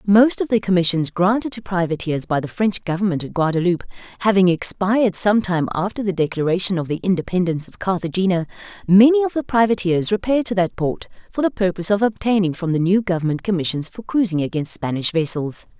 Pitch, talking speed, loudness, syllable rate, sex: 190 Hz, 180 wpm, -19 LUFS, 6.3 syllables/s, female